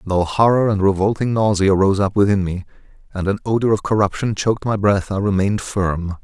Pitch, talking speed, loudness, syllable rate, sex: 100 Hz, 195 wpm, -18 LUFS, 5.7 syllables/s, male